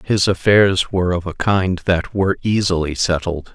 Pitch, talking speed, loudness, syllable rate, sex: 90 Hz, 170 wpm, -17 LUFS, 4.7 syllables/s, male